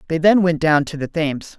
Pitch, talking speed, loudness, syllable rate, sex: 160 Hz, 265 wpm, -18 LUFS, 5.8 syllables/s, male